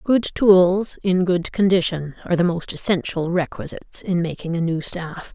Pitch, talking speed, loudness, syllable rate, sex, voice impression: 180 Hz, 170 wpm, -20 LUFS, 4.7 syllables/s, female, very feminine, middle-aged, thin, tensed, slightly powerful, slightly bright, hard, clear, fluent, slightly cool, intellectual, very refreshing, slightly sincere, calm, slightly friendly, reassuring, unique, elegant, slightly wild, slightly sweet, slightly lively, strict, sharp